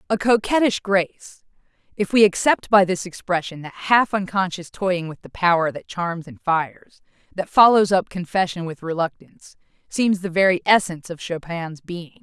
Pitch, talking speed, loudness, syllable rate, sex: 180 Hz, 150 wpm, -20 LUFS, 4.9 syllables/s, female